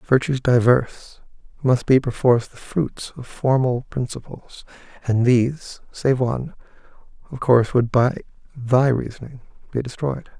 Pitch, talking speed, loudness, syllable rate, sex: 125 Hz, 125 wpm, -20 LUFS, 4.6 syllables/s, male